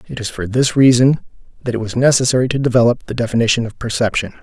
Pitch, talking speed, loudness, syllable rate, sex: 120 Hz, 205 wpm, -16 LUFS, 6.8 syllables/s, male